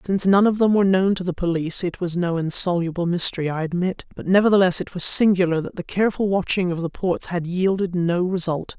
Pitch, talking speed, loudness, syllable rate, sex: 180 Hz, 220 wpm, -20 LUFS, 6.1 syllables/s, female